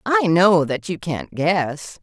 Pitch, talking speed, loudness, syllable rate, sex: 170 Hz, 175 wpm, -19 LUFS, 3.2 syllables/s, female